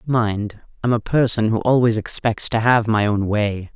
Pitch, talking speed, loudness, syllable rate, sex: 110 Hz, 190 wpm, -19 LUFS, 4.4 syllables/s, female